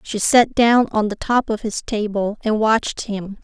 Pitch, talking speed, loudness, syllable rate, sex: 215 Hz, 210 wpm, -18 LUFS, 4.3 syllables/s, female